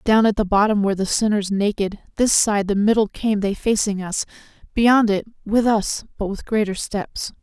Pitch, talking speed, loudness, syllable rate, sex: 210 Hz, 195 wpm, -20 LUFS, 5.0 syllables/s, female